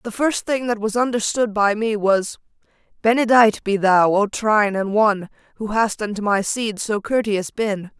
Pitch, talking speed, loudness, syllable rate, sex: 215 Hz, 180 wpm, -19 LUFS, 4.7 syllables/s, female